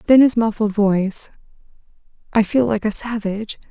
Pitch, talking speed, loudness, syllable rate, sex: 215 Hz, 145 wpm, -18 LUFS, 5.4 syllables/s, female